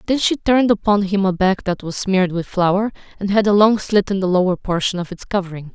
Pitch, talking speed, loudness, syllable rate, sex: 195 Hz, 250 wpm, -18 LUFS, 5.9 syllables/s, female